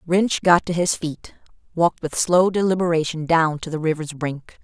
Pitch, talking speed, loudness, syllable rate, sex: 165 Hz, 180 wpm, -20 LUFS, 4.9 syllables/s, female